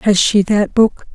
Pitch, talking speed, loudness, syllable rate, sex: 205 Hz, 210 wpm, -14 LUFS, 3.8 syllables/s, female